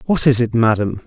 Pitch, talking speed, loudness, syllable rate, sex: 120 Hz, 225 wpm, -16 LUFS, 5.4 syllables/s, male